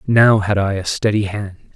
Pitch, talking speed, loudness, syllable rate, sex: 100 Hz, 205 wpm, -17 LUFS, 4.8 syllables/s, male